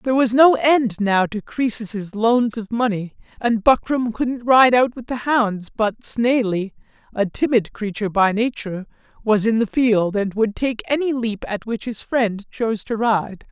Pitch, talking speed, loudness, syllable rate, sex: 225 Hz, 180 wpm, -19 LUFS, 3.8 syllables/s, male